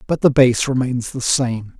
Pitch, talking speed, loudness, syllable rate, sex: 125 Hz, 200 wpm, -17 LUFS, 4.3 syllables/s, male